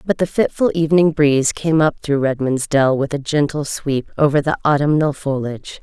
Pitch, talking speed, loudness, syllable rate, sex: 145 Hz, 185 wpm, -17 LUFS, 5.2 syllables/s, female